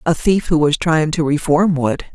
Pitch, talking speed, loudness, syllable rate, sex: 160 Hz, 225 wpm, -16 LUFS, 4.6 syllables/s, female